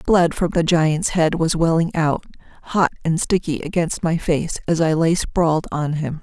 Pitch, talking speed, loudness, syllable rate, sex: 165 Hz, 195 wpm, -19 LUFS, 4.5 syllables/s, female